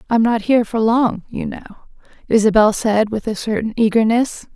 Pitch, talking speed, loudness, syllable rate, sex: 220 Hz, 170 wpm, -17 LUFS, 5.4 syllables/s, female